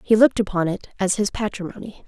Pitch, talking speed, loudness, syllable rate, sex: 205 Hz, 200 wpm, -22 LUFS, 6.5 syllables/s, female